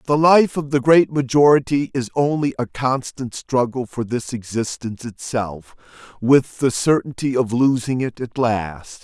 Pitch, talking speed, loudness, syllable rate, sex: 130 Hz, 155 wpm, -19 LUFS, 4.3 syllables/s, male